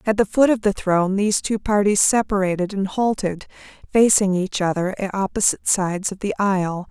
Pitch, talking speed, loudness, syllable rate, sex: 200 Hz, 180 wpm, -20 LUFS, 5.6 syllables/s, female